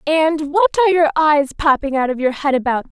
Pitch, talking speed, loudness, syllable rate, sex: 295 Hz, 220 wpm, -16 LUFS, 5.4 syllables/s, female